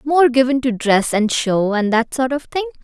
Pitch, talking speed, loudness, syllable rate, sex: 255 Hz, 235 wpm, -17 LUFS, 4.7 syllables/s, female